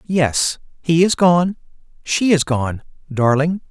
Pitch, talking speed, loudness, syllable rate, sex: 155 Hz, 115 wpm, -17 LUFS, 3.4 syllables/s, male